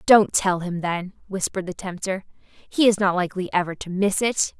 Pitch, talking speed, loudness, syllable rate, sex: 190 Hz, 195 wpm, -23 LUFS, 5.1 syllables/s, female